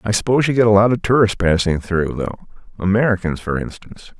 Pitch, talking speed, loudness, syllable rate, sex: 100 Hz, 200 wpm, -17 LUFS, 6.5 syllables/s, male